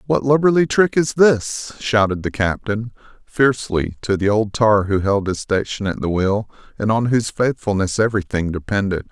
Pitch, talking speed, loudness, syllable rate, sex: 110 Hz, 170 wpm, -18 LUFS, 5.0 syllables/s, male